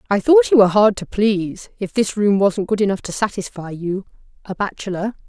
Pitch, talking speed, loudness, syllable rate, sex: 205 Hz, 205 wpm, -18 LUFS, 5.6 syllables/s, female